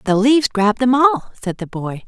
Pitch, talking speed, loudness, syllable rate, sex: 230 Hz, 230 wpm, -16 LUFS, 5.7 syllables/s, female